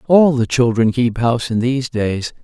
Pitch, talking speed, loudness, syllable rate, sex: 120 Hz, 200 wpm, -16 LUFS, 4.9 syllables/s, male